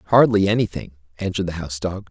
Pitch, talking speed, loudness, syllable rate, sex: 95 Hz, 170 wpm, -21 LUFS, 6.5 syllables/s, male